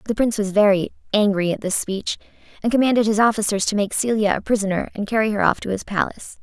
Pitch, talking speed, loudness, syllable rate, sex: 210 Hz, 225 wpm, -20 LUFS, 6.7 syllables/s, female